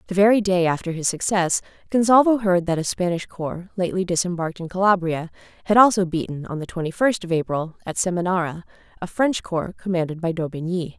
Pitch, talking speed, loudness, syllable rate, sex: 180 Hz, 180 wpm, -21 LUFS, 6.0 syllables/s, female